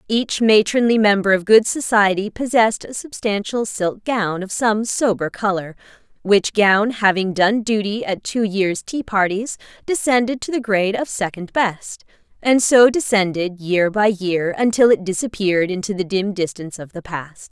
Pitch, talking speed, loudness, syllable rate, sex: 205 Hz, 165 wpm, -18 LUFS, 4.6 syllables/s, female